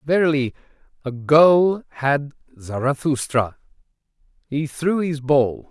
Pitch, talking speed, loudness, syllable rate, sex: 145 Hz, 95 wpm, -20 LUFS, 3.7 syllables/s, male